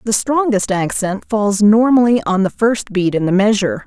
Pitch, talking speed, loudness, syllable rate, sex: 210 Hz, 185 wpm, -15 LUFS, 4.9 syllables/s, female